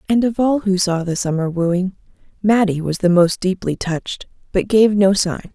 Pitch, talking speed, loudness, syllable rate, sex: 190 Hz, 195 wpm, -17 LUFS, 4.7 syllables/s, female